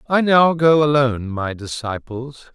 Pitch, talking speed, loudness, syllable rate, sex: 135 Hz, 140 wpm, -17 LUFS, 4.3 syllables/s, male